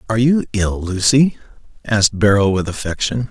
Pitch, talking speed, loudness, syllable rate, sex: 110 Hz, 145 wpm, -16 LUFS, 5.4 syllables/s, male